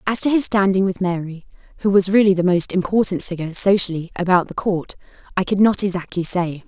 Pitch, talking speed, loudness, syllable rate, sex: 185 Hz, 200 wpm, -18 LUFS, 6.0 syllables/s, female